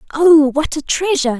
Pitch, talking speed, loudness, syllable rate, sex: 300 Hz, 170 wpm, -14 LUFS, 5.7 syllables/s, female